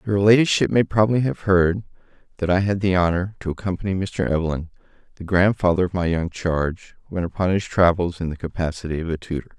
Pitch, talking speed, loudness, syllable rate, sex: 90 Hz, 195 wpm, -21 LUFS, 6.2 syllables/s, male